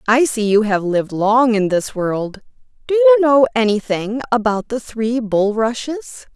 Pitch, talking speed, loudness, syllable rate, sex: 230 Hz, 160 wpm, -16 LUFS, 4.4 syllables/s, female